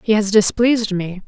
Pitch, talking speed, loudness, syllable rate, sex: 210 Hz, 190 wpm, -16 LUFS, 5.2 syllables/s, female